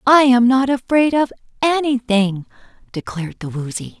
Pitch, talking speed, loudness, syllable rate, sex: 240 Hz, 135 wpm, -17 LUFS, 4.8 syllables/s, female